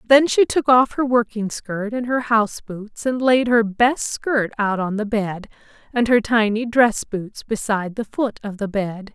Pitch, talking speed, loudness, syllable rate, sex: 225 Hz, 205 wpm, -20 LUFS, 4.3 syllables/s, female